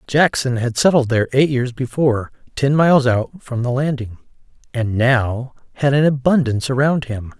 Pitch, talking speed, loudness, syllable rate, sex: 130 Hz, 160 wpm, -17 LUFS, 5.1 syllables/s, male